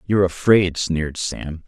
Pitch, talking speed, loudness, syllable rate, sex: 85 Hz, 145 wpm, -19 LUFS, 4.5 syllables/s, male